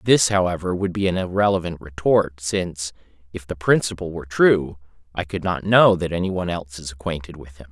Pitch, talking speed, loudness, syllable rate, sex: 85 Hz, 195 wpm, -21 LUFS, 5.8 syllables/s, male